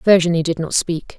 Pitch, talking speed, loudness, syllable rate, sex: 170 Hz, 200 wpm, -18 LUFS, 5.5 syllables/s, female